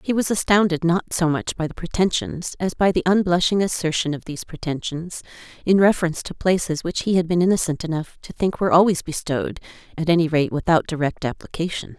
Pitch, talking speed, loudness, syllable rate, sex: 170 Hz, 190 wpm, -21 LUFS, 6.0 syllables/s, female